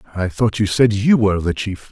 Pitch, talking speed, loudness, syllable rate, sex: 105 Hz, 250 wpm, -17 LUFS, 5.6 syllables/s, male